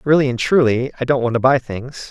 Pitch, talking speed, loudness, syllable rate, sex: 130 Hz, 255 wpm, -17 LUFS, 5.7 syllables/s, male